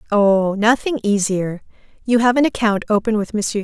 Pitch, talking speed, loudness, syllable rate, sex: 215 Hz, 165 wpm, -17 LUFS, 4.7 syllables/s, female